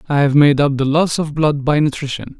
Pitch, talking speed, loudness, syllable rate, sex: 145 Hz, 250 wpm, -15 LUFS, 5.4 syllables/s, male